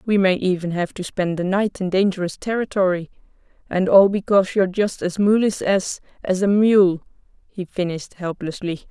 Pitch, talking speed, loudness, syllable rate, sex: 190 Hz, 170 wpm, -20 LUFS, 5.2 syllables/s, female